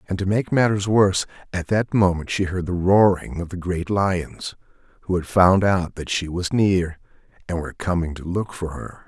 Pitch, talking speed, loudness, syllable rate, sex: 90 Hz, 205 wpm, -21 LUFS, 4.8 syllables/s, male